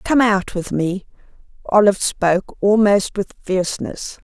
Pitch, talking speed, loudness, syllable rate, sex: 195 Hz, 125 wpm, -18 LUFS, 4.4 syllables/s, female